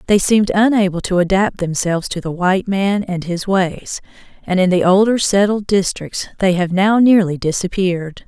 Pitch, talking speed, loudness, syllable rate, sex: 190 Hz, 175 wpm, -16 LUFS, 5.0 syllables/s, female